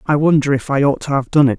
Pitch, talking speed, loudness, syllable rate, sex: 140 Hz, 340 wpm, -16 LUFS, 6.6 syllables/s, female